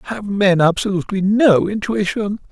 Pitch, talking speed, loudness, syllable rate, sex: 200 Hz, 120 wpm, -17 LUFS, 5.0 syllables/s, male